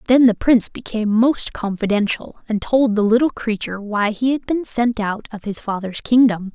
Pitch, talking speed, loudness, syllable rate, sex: 225 Hz, 190 wpm, -18 LUFS, 5.1 syllables/s, female